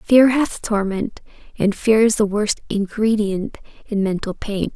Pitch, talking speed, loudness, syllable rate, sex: 210 Hz, 140 wpm, -19 LUFS, 4.0 syllables/s, female